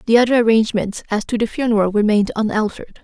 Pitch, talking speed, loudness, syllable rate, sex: 220 Hz, 180 wpm, -17 LUFS, 7.3 syllables/s, female